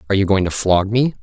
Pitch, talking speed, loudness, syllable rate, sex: 100 Hz, 295 wpm, -17 LUFS, 7.2 syllables/s, male